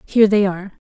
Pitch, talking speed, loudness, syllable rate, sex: 200 Hz, 205 wpm, -16 LUFS, 8.2 syllables/s, female